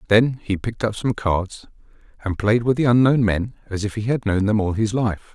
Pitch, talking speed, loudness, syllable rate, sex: 110 Hz, 235 wpm, -21 LUFS, 5.4 syllables/s, male